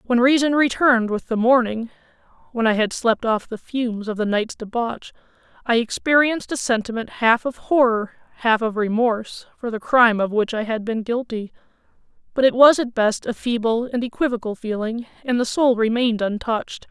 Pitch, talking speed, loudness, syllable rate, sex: 235 Hz, 175 wpm, -20 LUFS, 5.3 syllables/s, female